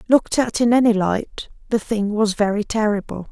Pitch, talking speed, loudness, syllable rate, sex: 215 Hz, 180 wpm, -19 LUFS, 5.2 syllables/s, female